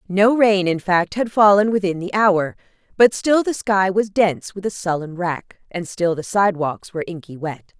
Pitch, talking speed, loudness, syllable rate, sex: 190 Hz, 200 wpm, -19 LUFS, 4.9 syllables/s, female